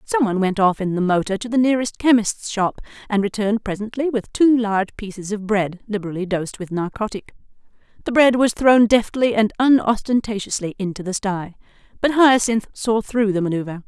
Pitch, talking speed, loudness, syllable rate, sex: 215 Hz, 175 wpm, -19 LUFS, 5.7 syllables/s, female